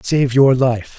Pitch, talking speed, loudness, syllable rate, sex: 130 Hz, 185 wpm, -14 LUFS, 3.4 syllables/s, male